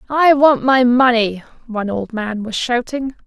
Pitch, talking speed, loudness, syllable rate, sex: 240 Hz, 165 wpm, -16 LUFS, 4.4 syllables/s, female